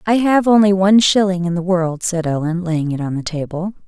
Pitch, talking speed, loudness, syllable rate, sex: 180 Hz, 230 wpm, -16 LUFS, 5.5 syllables/s, female